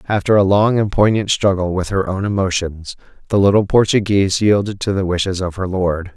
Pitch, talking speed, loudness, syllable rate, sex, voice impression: 95 Hz, 195 wpm, -16 LUFS, 5.5 syllables/s, male, masculine, adult-like, slightly powerful, slightly hard, fluent, cool, slightly sincere, mature, slightly friendly, wild, kind, modest